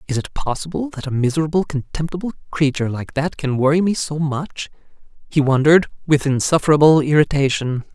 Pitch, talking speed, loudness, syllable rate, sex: 150 Hz, 150 wpm, -18 LUFS, 5.9 syllables/s, male